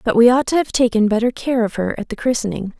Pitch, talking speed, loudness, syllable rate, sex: 230 Hz, 280 wpm, -17 LUFS, 6.3 syllables/s, female